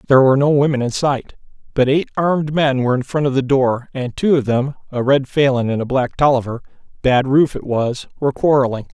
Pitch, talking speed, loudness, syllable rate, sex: 135 Hz, 205 wpm, -17 LUFS, 6.0 syllables/s, male